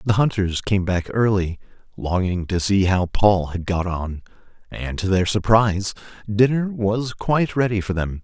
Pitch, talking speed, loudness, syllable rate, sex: 100 Hz, 170 wpm, -21 LUFS, 4.5 syllables/s, male